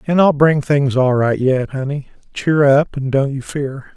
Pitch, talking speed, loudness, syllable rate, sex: 140 Hz, 195 wpm, -16 LUFS, 4.2 syllables/s, male